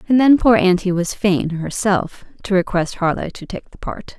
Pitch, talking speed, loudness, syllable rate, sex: 190 Hz, 200 wpm, -17 LUFS, 4.7 syllables/s, female